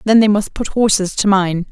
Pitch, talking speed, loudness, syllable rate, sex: 200 Hz, 245 wpm, -15 LUFS, 5.1 syllables/s, female